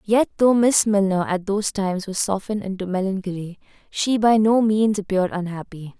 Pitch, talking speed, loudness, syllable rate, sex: 200 Hz, 170 wpm, -20 LUFS, 5.5 syllables/s, female